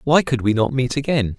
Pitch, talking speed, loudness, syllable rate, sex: 130 Hz, 260 wpm, -19 LUFS, 5.4 syllables/s, male